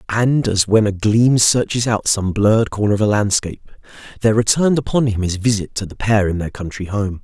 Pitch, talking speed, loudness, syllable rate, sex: 105 Hz, 215 wpm, -17 LUFS, 5.6 syllables/s, male